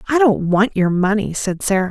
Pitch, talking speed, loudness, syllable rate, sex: 205 Hz, 220 wpm, -17 LUFS, 5.1 syllables/s, female